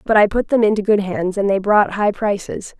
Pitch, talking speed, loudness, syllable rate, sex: 205 Hz, 260 wpm, -17 LUFS, 5.2 syllables/s, female